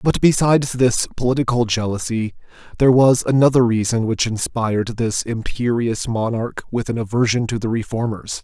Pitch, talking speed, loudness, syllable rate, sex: 120 Hz, 140 wpm, -19 LUFS, 5.2 syllables/s, male